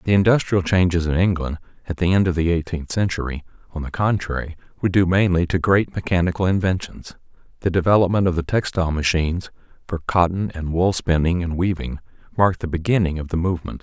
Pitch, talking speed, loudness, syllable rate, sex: 85 Hz, 180 wpm, -20 LUFS, 6.1 syllables/s, male